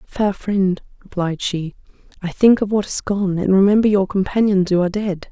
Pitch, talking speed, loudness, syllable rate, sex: 195 Hz, 190 wpm, -18 LUFS, 5.1 syllables/s, female